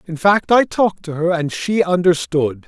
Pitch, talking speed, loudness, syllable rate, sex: 175 Hz, 200 wpm, -17 LUFS, 4.7 syllables/s, male